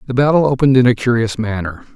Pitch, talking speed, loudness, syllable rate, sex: 125 Hz, 215 wpm, -14 LUFS, 7.1 syllables/s, male